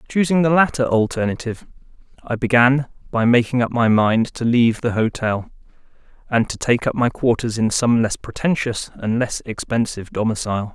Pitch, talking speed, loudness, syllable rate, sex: 120 Hz, 160 wpm, -19 LUFS, 5.4 syllables/s, male